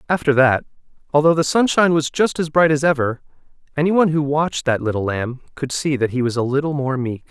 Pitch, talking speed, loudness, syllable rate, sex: 145 Hz, 220 wpm, -18 LUFS, 6.2 syllables/s, male